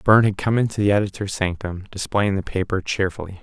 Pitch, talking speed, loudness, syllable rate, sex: 100 Hz, 190 wpm, -22 LUFS, 6.1 syllables/s, male